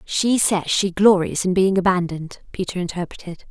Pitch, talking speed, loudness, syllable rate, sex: 185 Hz, 155 wpm, -19 LUFS, 5.1 syllables/s, female